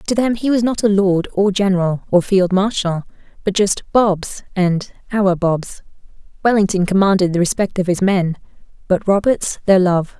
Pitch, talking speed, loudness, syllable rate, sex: 190 Hz, 170 wpm, -17 LUFS, 4.8 syllables/s, female